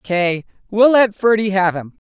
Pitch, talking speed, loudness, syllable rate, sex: 200 Hz, 175 wpm, -15 LUFS, 4.1 syllables/s, female